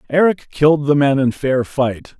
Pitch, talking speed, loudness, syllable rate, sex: 140 Hz, 190 wpm, -16 LUFS, 4.5 syllables/s, male